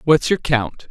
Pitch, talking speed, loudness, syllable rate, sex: 145 Hz, 200 wpm, -18 LUFS, 3.8 syllables/s, male